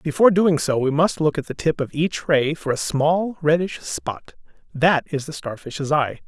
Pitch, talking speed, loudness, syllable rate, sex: 150 Hz, 210 wpm, -21 LUFS, 4.6 syllables/s, male